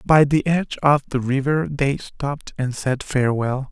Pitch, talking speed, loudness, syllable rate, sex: 135 Hz, 175 wpm, -21 LUFS, 4.6 syllables/s, male